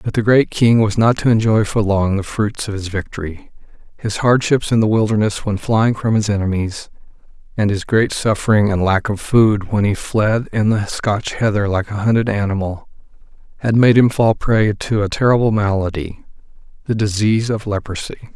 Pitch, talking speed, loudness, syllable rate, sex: 105 Hz, 185 wpm, -17 LUFS, 5.1 syllables/s, male